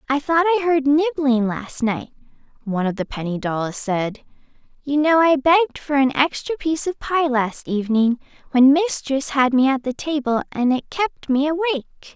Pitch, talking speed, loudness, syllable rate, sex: 275 Hz, 185 wpm, -20 LUFS, 5.2 syllables/s, female